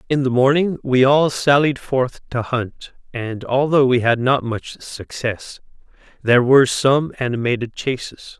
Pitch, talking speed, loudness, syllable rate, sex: 130 Hz, 150 wpm, -18 LUFS, 4.2 syllables/s, male